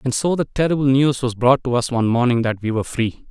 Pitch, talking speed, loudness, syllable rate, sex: 125 Hz, 270 wpm, -19 LUFS, 6.4 syllables/s, male